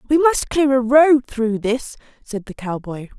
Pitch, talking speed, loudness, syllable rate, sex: 250 Hz, 190 wpm, -17 LUFS, 4.2 syllables/s, female